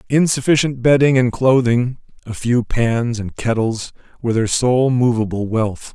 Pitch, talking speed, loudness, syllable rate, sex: 120 Hz, 140 wpm, -17 LUFS, 4.4 syllables/s, male